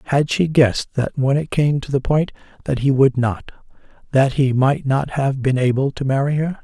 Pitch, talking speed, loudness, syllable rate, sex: 135 Hz, 215 wpm, -18 LUFS, 5.0 syllables/s, male